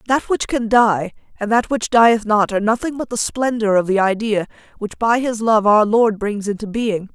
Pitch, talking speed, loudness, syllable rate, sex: 220 Hz, 220 wpm, -17 LUFS, 4.9 syllables/s, female